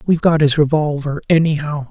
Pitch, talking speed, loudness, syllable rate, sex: 150 Hz, 160 wpm, -16 LUFS, 5.9 syllables/s, male